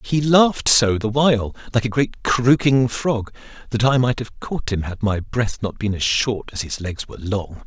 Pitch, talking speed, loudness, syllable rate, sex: 115 Hz, 220 wpm, -20 LUFS, 4.6 syllables/s, male